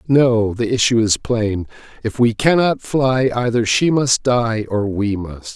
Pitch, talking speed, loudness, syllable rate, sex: 115 Hz, 175 wpm, -17 LUFS, 3.8 syllables/s, male